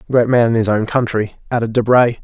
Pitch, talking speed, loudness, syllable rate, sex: 115 Hz, 240 wpm, -16 LUFS, 6.3 syllables/s, male